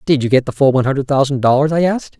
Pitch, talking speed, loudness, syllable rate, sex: 140 Hz, 300 wpm, -15 LUFS, 7.7 syllables/s, male